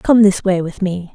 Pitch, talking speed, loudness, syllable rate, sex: 190 Hz, 260 wpm, -16 LUFS, 4.6 syllables/s, female